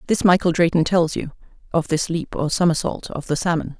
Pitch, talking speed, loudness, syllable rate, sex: 165 Hz, 205 wpm, -20 LUFS, 5.5 syllables/s, female